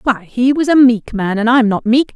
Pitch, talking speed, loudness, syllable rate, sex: 240 Hz, 280 wpm, -13 LUFS, 4.9 syllables/s, female